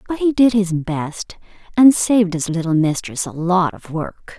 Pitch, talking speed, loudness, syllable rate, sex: 185 Hz, 190 wpm, -17 LUFS, 4.4 syllables/s, female